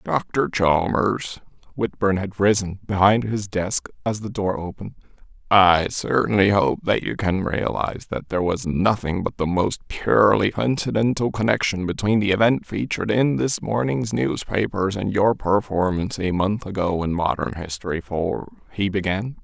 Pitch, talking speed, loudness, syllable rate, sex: 100 Hz, 145 wpm, -21 LUFS, 4.7 syllables/s, male